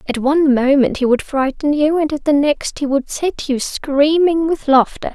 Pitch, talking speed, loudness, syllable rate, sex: 285 Hz, 210 wpm, -16 LUFS, 4.6 syllables/s, female